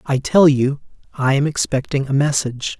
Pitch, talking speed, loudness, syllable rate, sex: 140 Hz, 170 wpm, -17 LUFS, 5.2 syllables/s, male